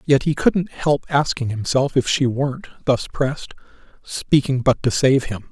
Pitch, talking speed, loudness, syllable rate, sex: 135 Hz, 175 wpm, -20 LUFS, 4.6 syllables/s, male